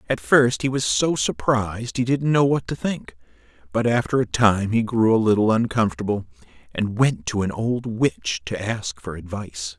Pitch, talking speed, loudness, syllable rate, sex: 110 Hz, 190 wpm, -21 LUFS, 4.8 syllables/s, male